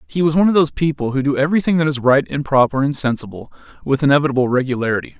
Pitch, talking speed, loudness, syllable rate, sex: 140 Hz, 220 wpm, -17 LUFS, 7.7 syllables/s, male